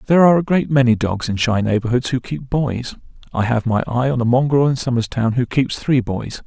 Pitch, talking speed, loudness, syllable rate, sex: 125 Hz, 230 wpm, -18 LUFS, 5.6 syllables/s, male